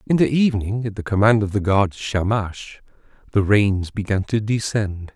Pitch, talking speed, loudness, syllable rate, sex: 105 Hz, 175 wpm, -20 LUFS, 4.7 syllables/s, male